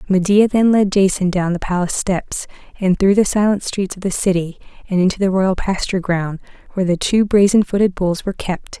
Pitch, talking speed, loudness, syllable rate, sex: 190 Hz, 205 wpm, -17 LUFS, 5.6 syllables/s, female